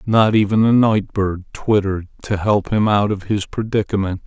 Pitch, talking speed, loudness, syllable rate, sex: 105 Hz, 185 wpm, -18 LUFS, 4.8 syllables/s, male